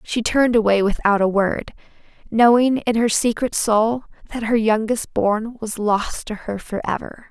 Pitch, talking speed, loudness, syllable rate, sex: 220 Hz, 165 wpm, -19 LUFS, 4.5 syllables/s, female